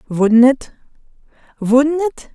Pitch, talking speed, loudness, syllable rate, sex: 260 Hz, 100 wpm, -15 LUFS, 3.1 syllables/s, female